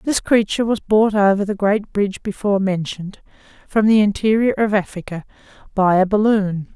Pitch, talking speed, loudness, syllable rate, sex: 205 Hz, 160 wpm, -18 LUFS, 5.5 syllables/s, female